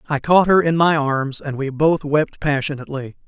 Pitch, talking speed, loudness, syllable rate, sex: 145 Hz, 200 wpm, -18 LUFS, 5.0 syllables/s, male